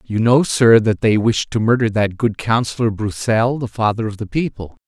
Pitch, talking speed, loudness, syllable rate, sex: 110 Hz, 210 wpm, -17 LUFS, 4.9 syllables/s, male